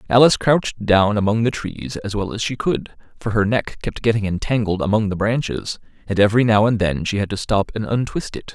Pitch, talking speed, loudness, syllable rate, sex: 110 Hz, 225 wpm, -19 LUFS, 5.8 syllables/s, male